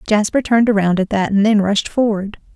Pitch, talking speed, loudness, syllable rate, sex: 210 Hz, 190 wpm, -16 LUFS, 5.8 syllables/s, female